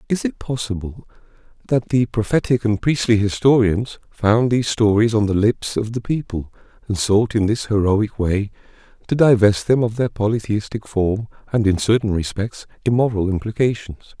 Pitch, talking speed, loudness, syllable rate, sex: 110 Hz, 155 wpm, -19 LUFS, 4.9 syllables/s, male